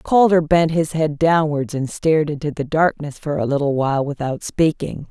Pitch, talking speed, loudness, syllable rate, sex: 150 Hz, 190 wpm, -19 LUFS, 5.0 syllables/s, female